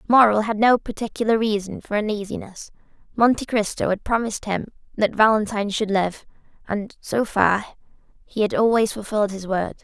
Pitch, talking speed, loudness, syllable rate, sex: 210 Hz, 155 wpm, -21 LUFS, 5.5 syllables/s, female